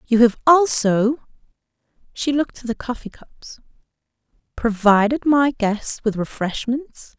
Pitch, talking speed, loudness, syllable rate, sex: 245 Hz, 100 wpm, -19 LUFS, 4.7 syllables/s, female